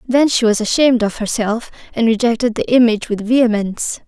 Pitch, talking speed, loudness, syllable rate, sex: 230 Hz, 175 wpm, -15 LUFS, 6.0 syllables/s, female